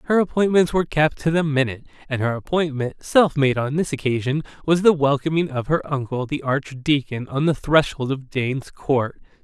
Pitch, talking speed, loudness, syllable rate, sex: 145 Hz, 185 wpm, -21 LUFS, 4.8 syllables/s, male